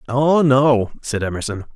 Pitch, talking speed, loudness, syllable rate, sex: 125 Hz, 135 wpm, -17 LUFS, 4.3 syllables/s, male